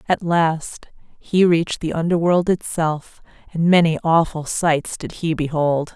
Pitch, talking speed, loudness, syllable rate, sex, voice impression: 165 Hz, 140 wpm, -19 LUFS, 4.0 syllables/s, female, feminine, adult-like, slightly tensed, slightly clear, intellectual, calm, slightly elegant